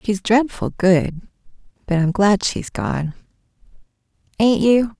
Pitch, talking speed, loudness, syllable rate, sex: 195 Hz, 120 wpm, -18 LUFS, 3.6 syllables/s, female